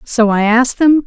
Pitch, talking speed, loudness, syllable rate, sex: 245 Hz, 225 wpm, -12 LUFS, 5.2 syllables/s, female